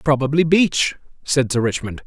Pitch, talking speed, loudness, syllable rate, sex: 140 Hz, 145 wpm, -18 LUFS, 4.7 syllables/s, male